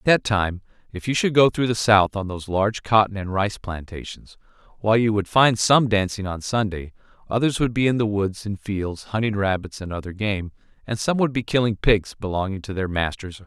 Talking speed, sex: 225 wpm, male